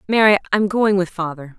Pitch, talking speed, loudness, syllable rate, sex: 190 Hz, 190 wpm, -18 LUFS, 5.5 syllables/s, female